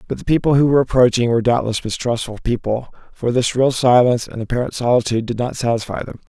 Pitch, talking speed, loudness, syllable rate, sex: 120 Hz, 200 wpm, -18 LUFS, 6.7 syllables/s, male